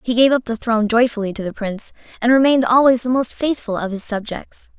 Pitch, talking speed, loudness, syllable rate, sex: 235 Hz, 225 wpm, -17 LUFS, 6.2 syllables/s, female